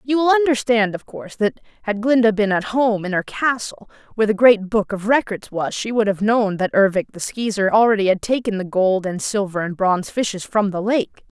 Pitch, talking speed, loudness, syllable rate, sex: 210 Hz, 220 wpm, -19 LUFS, 5.4 syllables/s, female